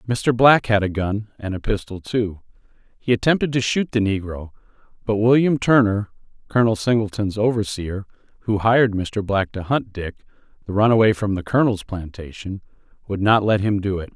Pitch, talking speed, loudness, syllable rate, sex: 105 Hz, 165 wpm, -20 LUFS, 5.0 syllables/s, male